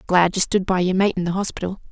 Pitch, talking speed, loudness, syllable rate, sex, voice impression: 185 Hz, 280 wpm, -20 LUFS, 6.5 syllables/s, female, very feminine, slightly adult-like, slightly soft, slightly fluent, slightly cute, calm, slightly elegant, slightly kind